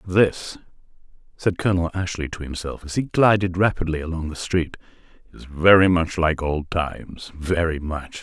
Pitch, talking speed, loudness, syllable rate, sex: 85 Hz, 145 wpm, -22 LUFS, 4.8 syllables/s, male